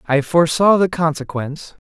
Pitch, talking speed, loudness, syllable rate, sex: 160 Hz, 130 wpm, -16 LUFS, 5.5 syllables/s, male